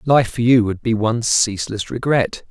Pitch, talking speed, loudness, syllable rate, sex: 115 Hz, 190 wpm, -18 LUFS, 5.0 syllables/s, male